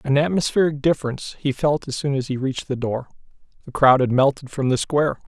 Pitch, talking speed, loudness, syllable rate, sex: 135 Hz, 210 wpm, -21 LUFS, 6.2 syllables/s, male